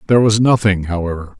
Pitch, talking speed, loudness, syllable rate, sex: 100 Hz, 170 wpm, -15 LUFS, 6.6 syllables/s, male